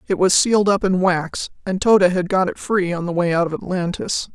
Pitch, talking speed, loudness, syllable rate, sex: 185 Hz, 250 wpm, -19 LUFS, 5.2 syllables/s, female